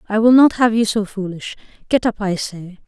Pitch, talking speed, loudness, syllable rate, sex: 210 Hz, 230 wpm, -17 LUFS, 5.4 syllables/s, female